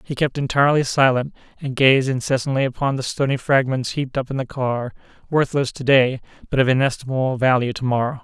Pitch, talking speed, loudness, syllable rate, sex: 130 Hz, 175 wpm, -20 LUFS, 6.0 syllables/s, male